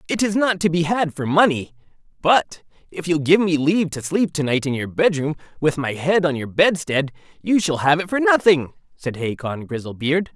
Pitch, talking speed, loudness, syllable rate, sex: 160 Hz, 210 wpm, -20 LUFS, 5.1 syllables/s, male